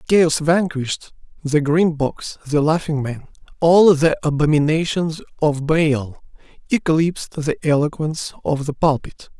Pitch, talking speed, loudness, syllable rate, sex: 155 Hz, 120 wpm, -19 LUFS, 4.8 syllables/s, male